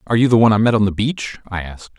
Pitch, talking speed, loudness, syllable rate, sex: 105 Hz, 330 wpm, -17 LUFS, 8.2 syllables/s, male